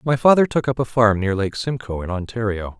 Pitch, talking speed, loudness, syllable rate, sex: 115 Hz, 235 wpm, -20 LUFS, 5.6 syllables/s, male